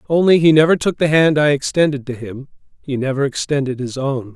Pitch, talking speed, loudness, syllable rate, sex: 140 Hz, 205 wpm, -16 LUFS, 5.7 syllables/s, male